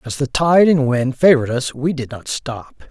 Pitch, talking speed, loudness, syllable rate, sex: 135 Hz, 225 wpm, -17 LUFS, 4.6 syllables/s, male